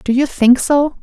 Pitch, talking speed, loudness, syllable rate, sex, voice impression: 265 Hz, 235 wpm, -13 LUFS, 4.3 syllables/s, female, slightly feminine, adult-like, slightly halting, slightly calm